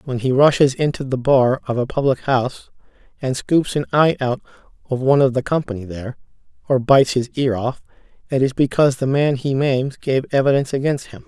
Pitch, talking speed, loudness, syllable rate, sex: 130 Hz, 195 wpm, -18 LUFS, 5.8 syllables/s, male